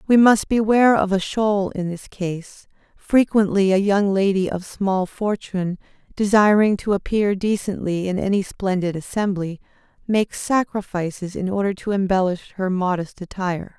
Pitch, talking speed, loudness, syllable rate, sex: 195 Hz, 145 wpm, -20 LUFS, 4.8 syllables/s, female